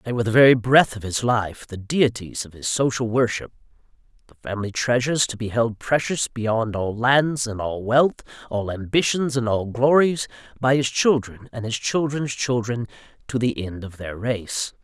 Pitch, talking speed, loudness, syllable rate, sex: 120 Hz, 180 wpm, -22 LUFS, 4.8 syllables/s, male